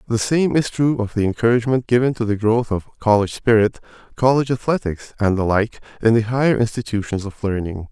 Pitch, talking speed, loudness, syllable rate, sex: 115 Hz, 190 wpm, -19 LUFS, 5.9 syllables/s, male